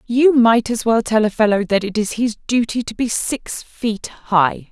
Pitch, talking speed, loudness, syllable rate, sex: 225 Hz, 215 wpm, -17 LUFS, 4.2 syllables/s, female